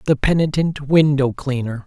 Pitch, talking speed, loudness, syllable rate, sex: 140 Hz, 130 wpm, -18 LUFS, 4.7 syllables/s, male